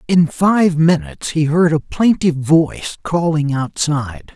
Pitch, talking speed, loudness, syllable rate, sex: 160 Hz, 140 wpm, -16 LUFS, 4.6 syllables/s, male